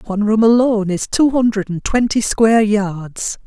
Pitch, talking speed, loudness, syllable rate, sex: 215 Hz, 175 wpm, -15 LUFS, 4.8 syllables/s, female